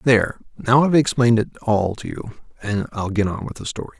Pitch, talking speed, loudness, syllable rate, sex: 115 Hz, 225 wpm, -20 LUFS, 6.3 syllables/s, male